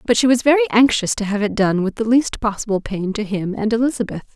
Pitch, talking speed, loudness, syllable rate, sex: 220 Hz, 250 wpm, -18 LUFS, 6.2 syllables/s, female